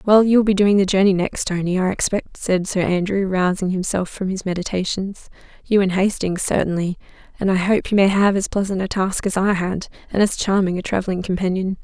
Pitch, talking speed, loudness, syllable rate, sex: 190 Hz, 210 wpm, -19 LUFS, 5.5 syllables/s, female